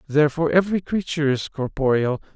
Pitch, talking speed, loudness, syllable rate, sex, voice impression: 150 Hz, 130 wpm, -21 LUFS, 6.8 syllables/s, male, very masculine, very adult-like, slightly thick, slightly sincere, slightly calm, friendly